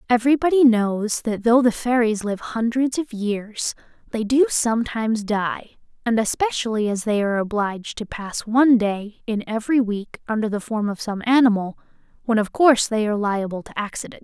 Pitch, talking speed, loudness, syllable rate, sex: 225 Hz, 175 wpm, -21 LUFS, 5.3 syllables/s, female